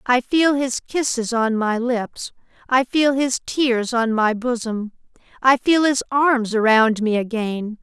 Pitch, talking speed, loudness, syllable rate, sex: 240 Hz, 160 wpm, -19 LUFS, 3.6 syllables/s, female